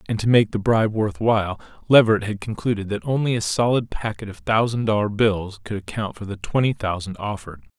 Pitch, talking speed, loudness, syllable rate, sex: 105 Hz, 200 wpm, -21 LUFS, 5.9 syllables/s, male